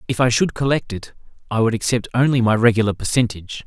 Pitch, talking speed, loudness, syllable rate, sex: 115 Hz, 195 wpm, -18 LUFS, 6.5 syllables/s, male